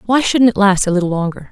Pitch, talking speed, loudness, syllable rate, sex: 200 Hz, 280 wpm, -14 LUFS, 6.6 syllables/s, female